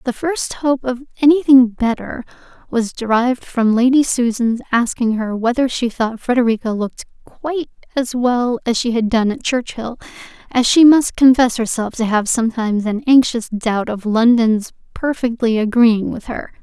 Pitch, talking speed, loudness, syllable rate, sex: 240 Hz, 160 wpm, -16 LUFS, 4.8 syllables/s, female